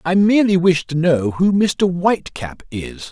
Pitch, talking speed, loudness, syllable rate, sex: 170 Hz, 190 wpm, -16 LUFS, 4.4 syllables/s, male